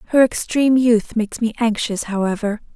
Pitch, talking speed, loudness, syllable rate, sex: 225 Hz, 155 wpm, -18 LUFS, 5.7 syllables/s, female